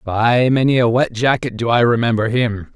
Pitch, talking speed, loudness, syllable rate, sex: 120 Hz, 195 wpm, -16 LUFS, 4.9 syllables/s, male